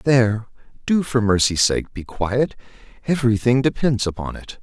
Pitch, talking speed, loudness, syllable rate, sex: 115 Hz, 155 wpm, -20 LUFS, 4.9 syllables/s, male